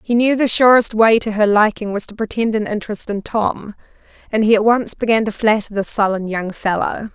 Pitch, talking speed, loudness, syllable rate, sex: 215 Hz, 220 wpm, -16 LUFS, 5.4 syllables/s, female